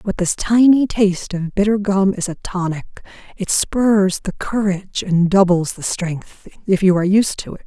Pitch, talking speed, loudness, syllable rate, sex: 195 Hz, 180 wpm, -17 LUFS, 4.8 syllables/s, female